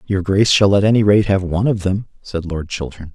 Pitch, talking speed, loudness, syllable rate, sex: 95 Hz, 250 wpm, -16 LUFS, 5.9 syllables/s, male